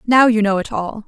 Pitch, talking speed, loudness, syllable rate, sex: 220 Hz, 280 wpm, -16 LUFS, 5.3 syllables/s, female